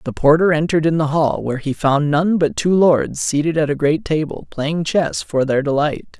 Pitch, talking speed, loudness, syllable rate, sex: 155 Hz, 225 wpm, -17 LUFS, 5.0 syllables/s, male